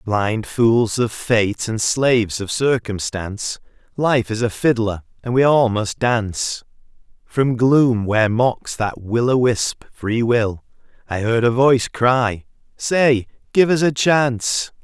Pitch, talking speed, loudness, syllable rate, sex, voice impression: 115 Hz, 140 wpm, -18 LUFS, 3.7 syllables/s, male, masculine, middle-aged, slightly powerful, raspy, mature, friendly, wild, lively, slightly intense, slightly light